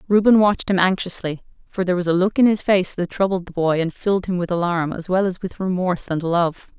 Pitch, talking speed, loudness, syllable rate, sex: 180 Hz, 245 wpm, -20 LUFS, 6.0 syllables/s, female